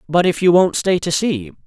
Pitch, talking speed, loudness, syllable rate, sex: 165 Hz, 250 wpm, -16 LUFS, 5.1 syllables/s, male